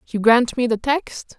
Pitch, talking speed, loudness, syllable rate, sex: 245 Hz, 215 wpm, -18 LUFS, 4.1 syllables/s, female